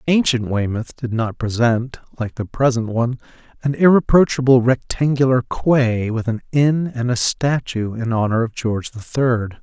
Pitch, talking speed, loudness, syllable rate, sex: 125 Hz, 155 wpm, -18 LUFS, 4.7 syllables/s, male